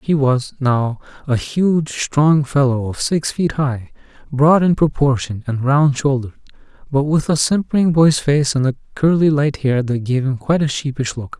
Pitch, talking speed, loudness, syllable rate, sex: 140 Hz, 180 wpm, -17 LUFS, 4.5 syllables/s, male